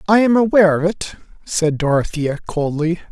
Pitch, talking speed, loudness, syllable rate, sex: 175 Hz, 155 wpm, -17 LUFS, 5.2 syllables/s, male